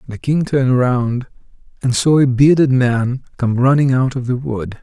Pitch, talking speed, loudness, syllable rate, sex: 130 Hz, 185 wpm, -16 LUFS, 4.6 syllables/s, male